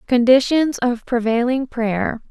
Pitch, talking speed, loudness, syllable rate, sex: 245 Hz, 105 wpm, -18 LUFS, 3.9 syllables/s, female